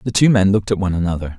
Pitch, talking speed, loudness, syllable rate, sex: 100 Hz, 305 wpm, -17 LUFS, 8.7 syllables/s, male